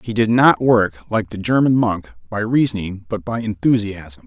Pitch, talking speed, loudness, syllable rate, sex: 105 Hz, 185 wpm, -18 LUFS, 4.7 syllables/s, male